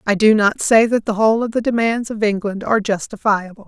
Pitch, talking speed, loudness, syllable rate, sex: 215 Hz, 230 wpm, -17 LUFS, 5.9 syllables/s, female